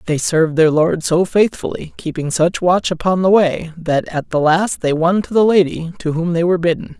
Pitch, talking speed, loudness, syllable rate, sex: 170 Hz, 225 wpm, -16 LUFS, 5.1 syllables/s, male